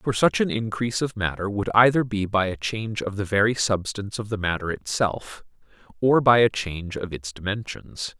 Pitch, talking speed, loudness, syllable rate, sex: 105 Hz, 200 wpm, -23 LUFS, 5.3 syllables/s, male